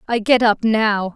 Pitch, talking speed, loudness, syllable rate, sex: 220 Hz, 210 wpm, -16 LUFS, 4.0 syllables/s, female